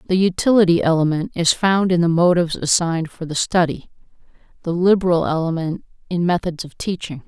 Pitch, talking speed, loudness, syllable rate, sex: 170 Hz, 155 wpm, -18 LUFS, 5.8 syllables/s, female